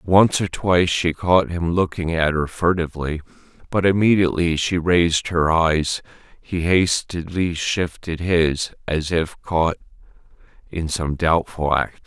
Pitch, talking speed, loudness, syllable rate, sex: 85 Hz, 135 wpm, -20 LUFS, 4.1 syllables/s, male